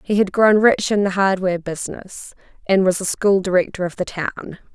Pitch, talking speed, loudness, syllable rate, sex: 190 Hz, 200 wpm, -18 LUFS, 5.3 syllables/s, female